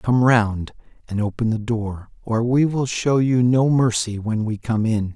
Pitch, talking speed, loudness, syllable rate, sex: 115 Hz, 200 wpm, -20 LUFS, 4.1 syllables/s, male